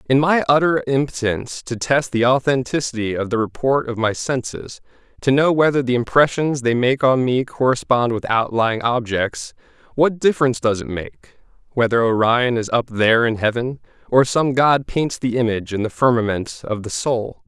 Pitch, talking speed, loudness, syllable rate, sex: 125 Hz, 175 wpm, -19 LUFS, 5.0 syllables/s, male